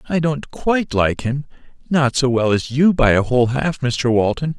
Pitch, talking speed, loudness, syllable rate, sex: 135 Hz, 195 wpm, -18 LUFS, 4.8 syllables/s, male